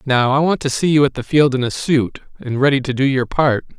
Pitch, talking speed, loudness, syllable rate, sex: 135 Hz, 285 wpm, -17 LUFS, 5.6 syllables/s, male